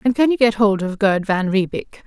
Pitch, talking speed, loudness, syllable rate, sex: 210 Hz, 260 wpm, -18 LUFS, 5.1 syllables/s, female